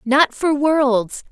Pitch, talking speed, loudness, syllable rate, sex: 275 Hz, 135 wpm, -17 LUFS, 2.6 syllables/s, female